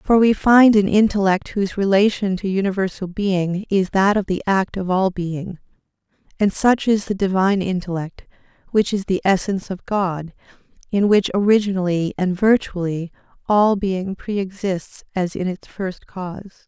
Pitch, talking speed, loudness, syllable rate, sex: 195 Hz, 160 wpm, -19 LUFS, 4.7 syllables/s, female